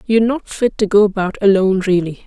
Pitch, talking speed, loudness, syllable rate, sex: 200 Hz, 210 wpm, -15 LUFS, 6.3 syllables/s, female